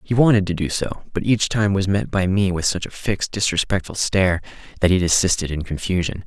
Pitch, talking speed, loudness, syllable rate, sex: 95 Hz, 220 wpm, -20 LUFS, 5.8 syllables/s, male